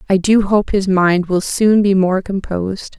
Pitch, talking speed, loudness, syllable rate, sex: 195 Hz, 200 wpm, -15 LUFS, 4.3 syllables/s, female